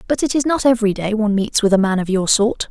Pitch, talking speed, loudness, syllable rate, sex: 220 Hz, 310 wpm, -17 LUFS, 6.7 syllables/s, female